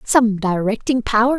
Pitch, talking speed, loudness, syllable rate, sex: 225 Hz, 130 wpm, -18 LUFS, 4.5 syllables/s, female